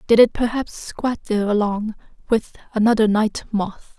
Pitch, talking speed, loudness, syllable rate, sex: 215 Hz, 150 wpm, -20 LUFS, 4.7 syllables/s, female